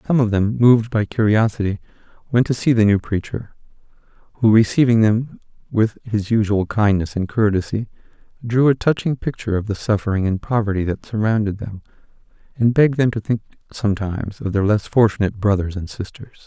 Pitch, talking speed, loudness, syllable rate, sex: 110 Hz, 170 wpm, -19 LUFS, 5.7 syllables/s, male